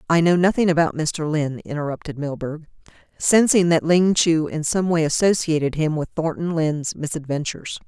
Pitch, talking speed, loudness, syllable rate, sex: 160 Hz, 160 wpm, -20 LUFS, 5.4 syllables/s, female